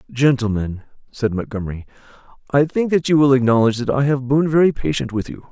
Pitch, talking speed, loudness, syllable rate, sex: 130 Hz, 185 wpm, -18 LUFS, 6.1 syllables/s, male